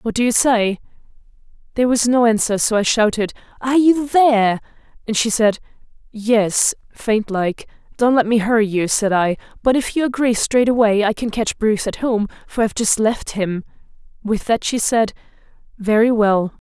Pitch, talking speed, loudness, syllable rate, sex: 225 Hz, 180 wpm, -17 LUFS, 5.0 syllables/s, female